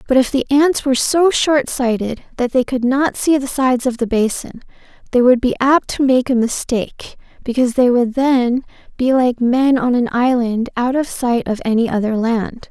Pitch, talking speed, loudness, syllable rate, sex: 250 Hz, 205 wpm, -16 LUFS, 4.9 syllables/s, female